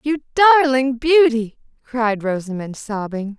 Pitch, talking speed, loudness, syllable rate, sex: 250 Hz, 105 wpm, -17 LUFS, 3.8 syllables/s, female